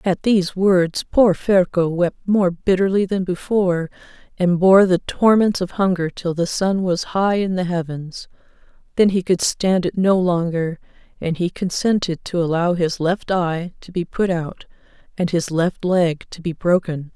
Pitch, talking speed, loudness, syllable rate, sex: 180 Hz, 175 wpm, -19 LUFS, 4.3 syllables/s, female